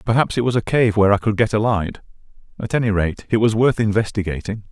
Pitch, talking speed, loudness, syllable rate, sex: 110 Hz, 215 wpm, -19 LUFS, 6.3 syllables/s, male